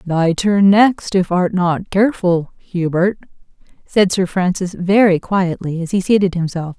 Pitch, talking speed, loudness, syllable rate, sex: 185 Hz, 150 wpm, -16 LUFS, 4.2 syllables/s, female